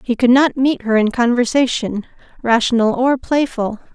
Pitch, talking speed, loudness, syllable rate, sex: 245 Hz, 150 wpm, -16 LUFS, 4.7 syllables/s, female